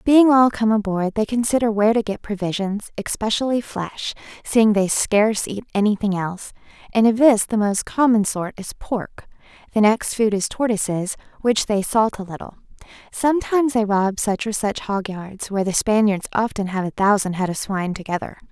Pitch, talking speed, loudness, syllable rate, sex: 210 Hz, 180 wpm, -20 LUFS, 5.3 syllables/s, female